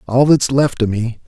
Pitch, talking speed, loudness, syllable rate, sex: 125 Hz, 235 wpm, -15 LUFS, 4.6 syllables/s, male